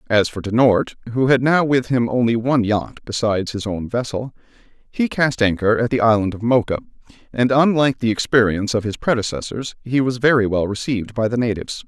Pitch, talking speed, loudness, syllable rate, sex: 115 Hz, 195 wpm, -19 LUFS, 5.9 syllables/s, male